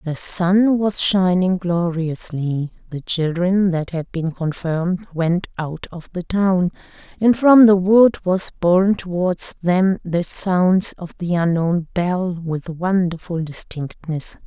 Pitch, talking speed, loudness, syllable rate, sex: 175 Hz, 135 wpm, -19 LUFS, 3.5 syllables/s, female